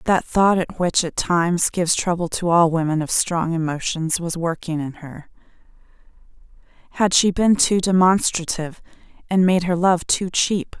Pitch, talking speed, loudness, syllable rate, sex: 175 Hz, 155 wpm, -19 LUFS, 4.5 syllables/s, female